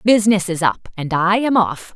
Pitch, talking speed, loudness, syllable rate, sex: 190 Hz, 215 wpm, -17 LUFS, 5.1 syllables/s, female